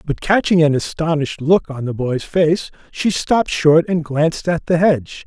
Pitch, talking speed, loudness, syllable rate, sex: 160 Hz, 195 wpm, -17 LUFS, 4.9 syllables/s, male